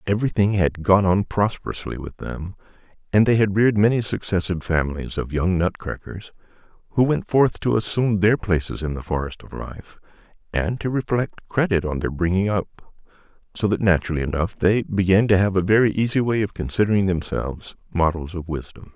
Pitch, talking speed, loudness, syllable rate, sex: 95 Hz, 170 wpm, -22 LUFS, 5.6 syllables/s, male